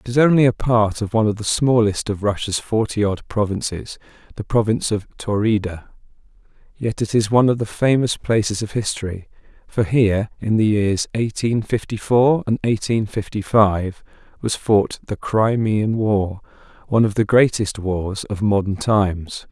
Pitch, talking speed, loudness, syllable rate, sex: 105 Hz, 165 wpm, -19 LUFS, 4.8 syllables/s, male